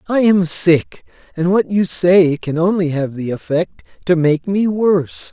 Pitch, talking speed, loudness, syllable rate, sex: 175 Hz, 180 wpm, -16 LUFS, 4.2 syllables/s, male